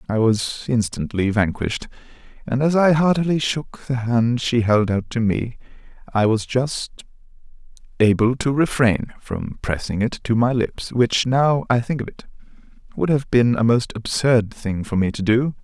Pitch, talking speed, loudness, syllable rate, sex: 120 Hz, 175 wpm, -20 LUFS, 4.5 syllables/s, male